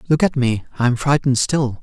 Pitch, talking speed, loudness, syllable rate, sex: 130 Hz, 165 wpm, -18 LUFS, 5.4 syllables/s, male